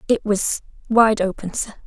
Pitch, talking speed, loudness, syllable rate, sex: 210 Hz, 160 wpm, -20 LUFS, 4.3 syllables/s, female